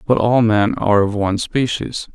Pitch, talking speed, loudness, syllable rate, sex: 110 Hz, 195 wpm, -17 LUFS, 5.0 syllables/s, male